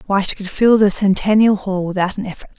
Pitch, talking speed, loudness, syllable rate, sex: 200 Hz, 230 wpm, -16 LUFS, 6.0 syllables/s, female